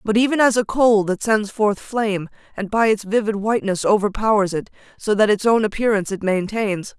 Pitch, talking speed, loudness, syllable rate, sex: 210 Hz, 200 wpm, -19 LUFS, 5.5 syllables/s, female